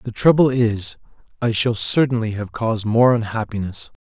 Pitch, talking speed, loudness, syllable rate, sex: 115 Hz, 145 wpm, -19 LUFS, 5.0 syllables/s, male